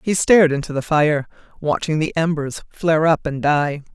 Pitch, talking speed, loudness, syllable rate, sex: 155 Hz, 180 wpm, -18 LUFS, 5.0 syllables/s, female